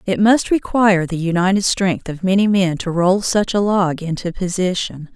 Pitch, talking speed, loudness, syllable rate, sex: 185 Hz, 185 wpm, -17 LUFS, 4.8 syllables/s, female